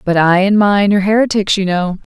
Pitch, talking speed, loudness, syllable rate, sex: 195 Hz, 225 wpm, -13 LUFS, 5.7 syllables/s, female